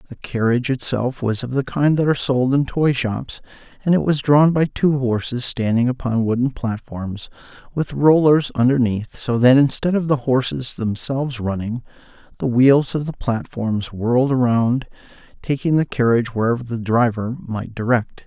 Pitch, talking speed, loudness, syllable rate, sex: 125 Hz, 165 wpm, -19 LUFS, 4.8 syllables/s, male